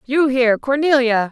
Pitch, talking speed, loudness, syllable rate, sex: 255 Hz, 135 wpm, -16 LUFS, 5.0 syllables/s, female